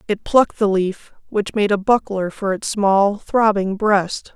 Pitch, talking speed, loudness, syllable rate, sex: 205 Hz, 180 wpm, -18 LUFS, 4.0 syllables/s, female